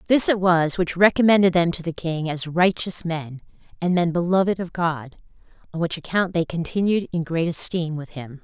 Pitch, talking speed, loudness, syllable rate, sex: 170 Hz, 190 wpm, -21 LUFS, 5.1 syllables/s, female